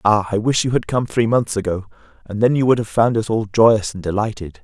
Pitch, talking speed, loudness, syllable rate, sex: 110 Hz, 245 wpm, -18 LUFS, 5.3 syllables/s, male